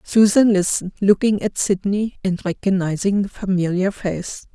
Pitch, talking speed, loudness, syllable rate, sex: 195 Hz, 130 wpm, -19 LUFS, 4.7 syllables/s, female